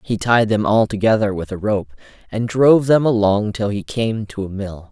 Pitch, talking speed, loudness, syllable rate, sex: 105 Hz, 220 wpm, -18 LUFS, 5.0 syllables/s, male